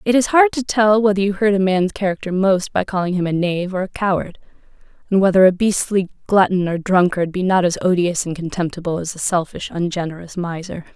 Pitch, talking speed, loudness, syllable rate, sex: 185 Hz, 210 wpm, -18 LUFS, 5.8 syllables/s, female